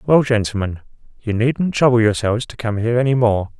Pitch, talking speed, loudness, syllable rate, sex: 115 Hz, 185 wpm, -18 LUFS, 5.9 syllables/s, male